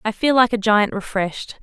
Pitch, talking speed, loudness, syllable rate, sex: 215 Hz, 220 wpm, -18 LUFS, 5.4 syllables/s, female